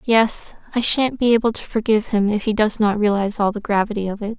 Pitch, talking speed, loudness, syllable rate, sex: 215 Hz, 245 wpm, -19 LUFS, 6.1 syllables/s, female